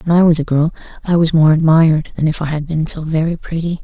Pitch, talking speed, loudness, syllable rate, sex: 160 Hz, 265 wpm, -15 LUFS, 6.2 syllables/s, female